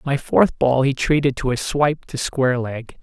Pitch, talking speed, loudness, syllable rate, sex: 135 Hz, 220 wpm, -19 LUFS, 4.9 syllables/s, male